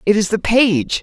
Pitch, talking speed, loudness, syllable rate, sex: 220 Hz, 235 wpm, -15 LUFS, 4.4 syllables/s, female